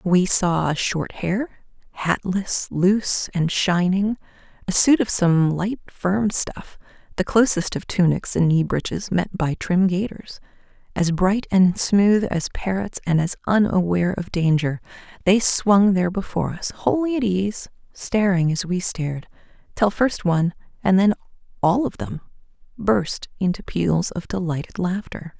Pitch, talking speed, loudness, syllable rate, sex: 185 Hz, 145 wpm, -21 LUFS, 4.2 syllables/s, female